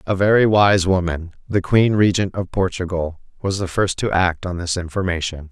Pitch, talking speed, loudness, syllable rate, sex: 95 Hz, 165 wpm, -19 LUFS, 5.0 syllables/s, male